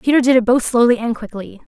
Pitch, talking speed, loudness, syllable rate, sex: 235 Hz, 240 wpm, -15 LUFS, 6.6 syllables/s, female